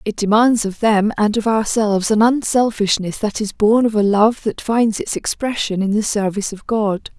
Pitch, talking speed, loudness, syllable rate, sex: 215 Hz, 200 wpm, -17 LUFS, 4.9 syllables/s, female